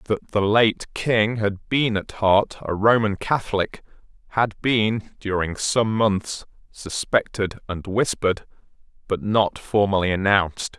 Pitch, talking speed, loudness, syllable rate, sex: 105 Hz, 130 wpm, -22 LUFS, 3.8 syllables/s, male